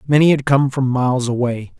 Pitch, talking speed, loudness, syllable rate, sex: 130 Hz, 200 wpm, -17 LUFS, 5.6 syllables/s, male